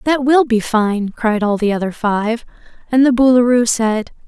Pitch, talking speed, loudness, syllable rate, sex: 230 Hz, 180 wpm, -15 LUFS, 4.5 syllables/s, female